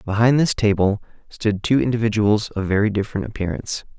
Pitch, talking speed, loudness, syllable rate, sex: 105 Hz, 150 wpm, -20 LUFS, 6.0 syllables/s, male